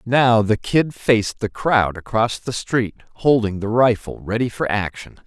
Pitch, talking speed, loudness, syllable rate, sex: 115 Hz, 170 wpm, -19 LUFS, 4.3 syllables/s, male